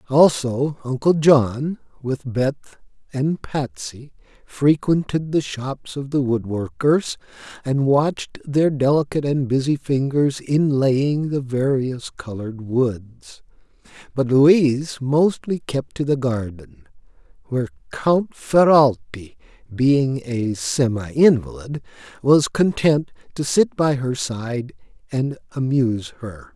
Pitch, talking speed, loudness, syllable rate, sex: 135 Hz, 115 wpm, -20 LUFS, 3.7 syllables/s, male